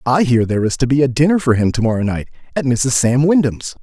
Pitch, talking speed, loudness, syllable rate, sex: 130 Hz, 265 wpm, -16 LUFS, 6.2 syllables/s, male